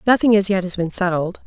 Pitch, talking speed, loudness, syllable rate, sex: 190 Hz, 245 wpm, -18 LUFS, 6.0 syllables/s, female